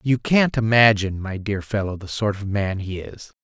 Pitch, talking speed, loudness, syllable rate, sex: 105 Hz, 210 wpm, -21 LUFS, 4.9 syllables/s, male